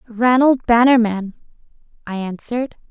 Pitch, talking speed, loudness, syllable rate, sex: 230 Hz, 85 wpm, -16 LUFS, 4.7 syllables/s, female